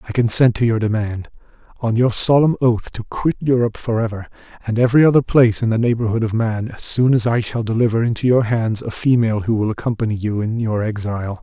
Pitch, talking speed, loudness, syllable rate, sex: 115 Hz, 210 wpm, -18 LUFS, 6.1 syllables/s, male